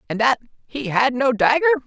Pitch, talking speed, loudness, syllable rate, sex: 230 Hz, 195 wpm, -19 LUFS, 5.6 syllables/s, male